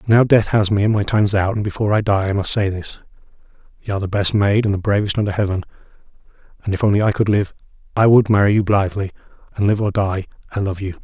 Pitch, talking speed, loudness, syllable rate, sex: 100 Hz, 245 wpm, -18 LUFS, 7.0 syllables/s, male